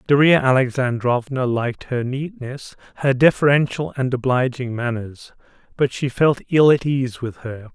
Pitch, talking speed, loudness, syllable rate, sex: 130 Hz, 140 wpm, -19 LUFS, 4.6 syllables/s, male